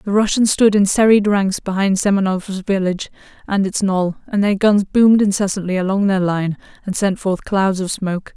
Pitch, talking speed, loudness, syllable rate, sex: 195 Hz, 185 wpm, -17 LUFS, 5.2 syllables/s, female